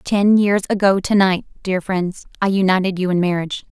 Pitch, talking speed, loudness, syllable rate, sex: 190 Hz, 190 wpm, -18 LUFS, 5.3 syllables/s, female